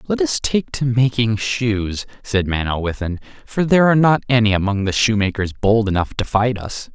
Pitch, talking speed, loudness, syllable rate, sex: 110 Hz, 180 wpm, -18 LUFS, 5.0 syllables/s, male